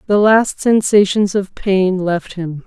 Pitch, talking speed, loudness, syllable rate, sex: 195 Hz, 155 wpm, -15 LUFS, 3.6 syllables/s, female